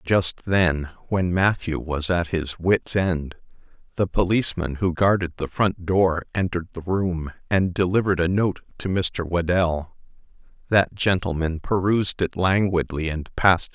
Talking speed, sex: 160 wpm, male